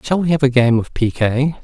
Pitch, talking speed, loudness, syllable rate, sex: 135 Hz, 255 wpm, -16 LUFS, 5.4 syllables/s, male